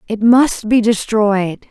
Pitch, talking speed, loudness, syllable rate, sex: 220 Hz, 140 wpm, -14 LUFS, 3.3 syllables/s, female